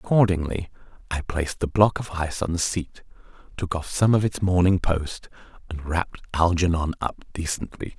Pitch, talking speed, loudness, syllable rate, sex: 90 Hz, 165 wpm, -24 LUFS, 5.2 syllables/s, male